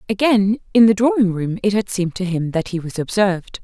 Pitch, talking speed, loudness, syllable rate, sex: 200 Hz, 230 wpm, -18 LUFS, 5.9 syllables/s, female